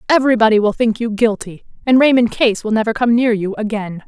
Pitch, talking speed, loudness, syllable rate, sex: 225 Hz, 205 wpm, -15 LUFS, 6.0 syllables/s, female